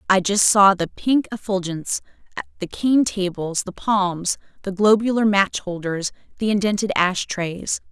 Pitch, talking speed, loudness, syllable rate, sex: 195 Hz, 145 wpm, -20 LUFS, 4.3 syllables/s, female